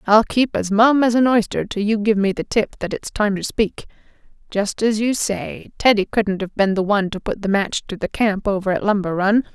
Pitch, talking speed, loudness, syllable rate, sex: 210 Hz, 245 wpm, -19 LUFS, 5.2 syllables/s, female